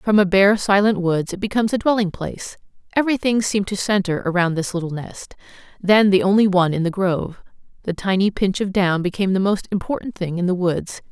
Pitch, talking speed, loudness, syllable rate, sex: 195 Hz, 205 wpm, -19 LUFS, 6.0 syllables/s, female